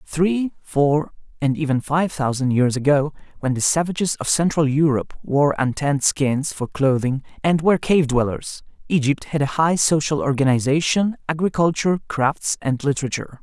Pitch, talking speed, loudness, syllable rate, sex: 145 Hz, 150 wpm, -20 LUFS, 5.0 syllables/s, male